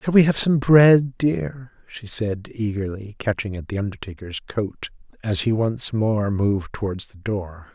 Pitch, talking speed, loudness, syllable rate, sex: 110 Hz, 170 wpm, -21 LUFS, 4.3 syllables/s, male